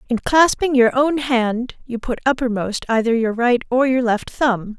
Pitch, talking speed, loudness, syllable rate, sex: 245 Hz, 190 wpm, -18 LUFS, 4.4 syllables/s, female